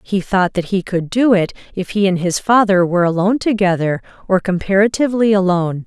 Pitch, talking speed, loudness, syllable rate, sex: 190 Hz, 185 wpm, -16 LUFS, 5.9 syllables/s, female